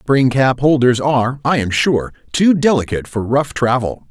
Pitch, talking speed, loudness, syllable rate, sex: 130 Hz, 175 wpm, -15 LUFS, 4.7 syllables/s, male